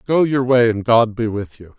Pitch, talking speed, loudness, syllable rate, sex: 120 Hz, 270 wpm, -17 LUFS, 4.8 syllables/s, male